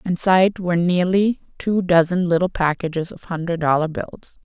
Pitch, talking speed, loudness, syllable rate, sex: 175 Hz, 150 wpm, -19 LUFS, 5.5 syllables/s, female